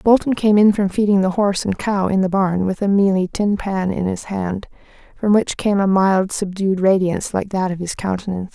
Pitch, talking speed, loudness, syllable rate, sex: 195 Hz, 225 wpm, -18 LUFS, 5.3 syllables/s, female